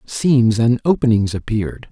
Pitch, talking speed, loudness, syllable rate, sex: 115 Hz, 125 wpm, -16 LUFS, 4.5 syllables/s, male